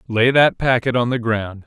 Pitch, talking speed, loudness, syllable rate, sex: 120 Hz, 215 wpm, -17 LUFS, 4.6 syllables/s, male